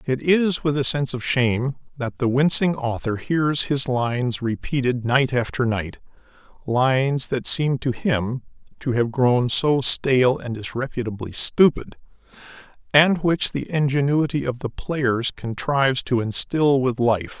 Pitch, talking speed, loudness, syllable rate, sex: 130 Hz, 145 wpm, -21 LUFS, 4.2 syllables/s, male